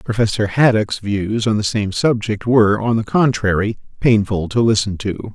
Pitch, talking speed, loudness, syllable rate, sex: 110 Hz, 170 wpm, -17 LUFS, 4.8 syllables/s, male